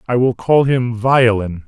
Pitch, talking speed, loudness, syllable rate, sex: 120 Hz, 180 wpm, -15 LUFS, 4.1 syllables/s, male